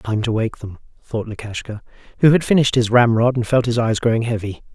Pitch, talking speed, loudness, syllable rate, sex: 115 Hz, 215 wpm, -18 LUFS, 6.0 syllables/s, male